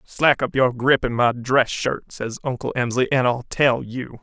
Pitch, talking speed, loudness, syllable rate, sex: 125 Hz, 215 wpm, -21 LUFS, 4.3 syllables/s, male